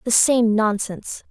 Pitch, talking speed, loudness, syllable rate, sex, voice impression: 225 Hz, 140 wpm, -19 LUFS, 4.4 syllables/s, female, feminine, slightly adult-like, fluent, slightly cute, slightly refreshing, friendly